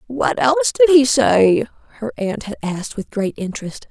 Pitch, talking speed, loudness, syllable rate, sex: 240 Hz, 185 wpm, -17 LUFS, 4.9 syllables/s, female